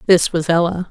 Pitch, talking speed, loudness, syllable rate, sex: 170 Hz, 200 wpm, -16 LUFS, 5.3 syllables/s, female